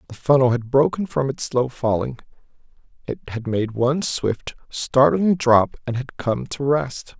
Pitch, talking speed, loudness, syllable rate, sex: 130 Hz, 165 wpm, -21 LUFS, 4.3 syllables/s, male